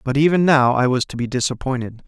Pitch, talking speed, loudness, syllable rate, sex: 130 Hz, 230 wpm, -18 LUFS, 6.1 syllables/s, male